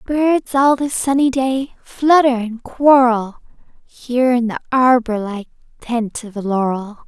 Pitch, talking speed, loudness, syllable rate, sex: 245 Hz, 145 wpm, -16 LUFS, 3.9 syllables/s, female